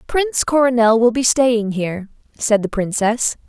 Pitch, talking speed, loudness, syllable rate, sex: 235 Hz, 155 wpm, -17 LUFS, 4.7 syllables/s, female